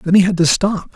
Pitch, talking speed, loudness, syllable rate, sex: 185 Hz, 315 wpm, -15 LUFS, 5.6 syllables/s, male